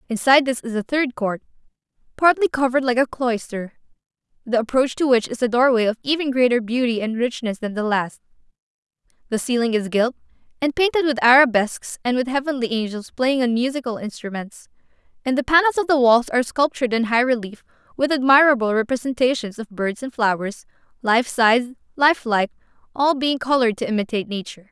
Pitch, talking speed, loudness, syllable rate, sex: 245 Hz, 170 wpm, -20 LUFS, 5.9 syllables/s, female